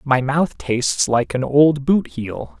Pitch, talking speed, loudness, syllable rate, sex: 125 Hz, 185 wpm, -18 LUFS, 3.7 syllables/s, male